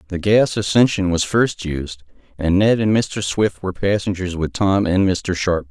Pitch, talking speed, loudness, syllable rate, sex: 95 Hz, 190 wpm, -18 LUFS, 4.5 syllables/s, male